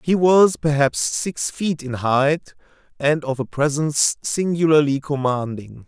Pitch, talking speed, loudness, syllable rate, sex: 145 Hz, 135 wpm, -19 LUFS, 4.0 syllables/s, male